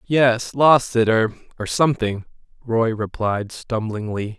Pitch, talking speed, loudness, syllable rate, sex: 115 Hz, 110 wpm, -20 LUFS, 3.9 syllables/s, male